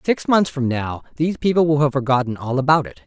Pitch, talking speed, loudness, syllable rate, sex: 140 Hz, 235 wpm, -19 LUFS, 6.2 syllables/s, male